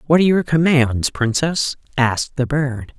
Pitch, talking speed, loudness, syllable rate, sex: 135 Hz, 160 wpm, -18 LUFS, 4.6 syllables/s, female